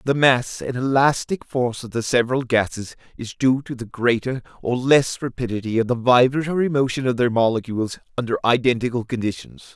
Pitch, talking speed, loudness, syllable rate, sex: 125 Hz, 165 wpm, -21 LUFS, 5.6 syllables/s, male